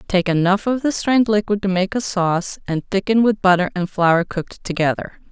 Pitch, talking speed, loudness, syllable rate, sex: 195 Hz, 205 wpm, -19 LUFS, 5.5 syllables/s, female